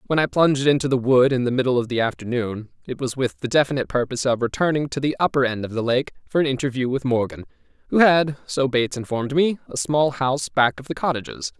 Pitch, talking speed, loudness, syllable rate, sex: 130 Hz, 235 wpm, -21 LUFS, 6.5 syllables/s, male